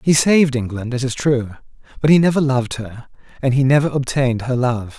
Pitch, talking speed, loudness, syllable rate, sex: 130 Hz, 205 wpm, -17 LUFS, 5.9 syllables/s, male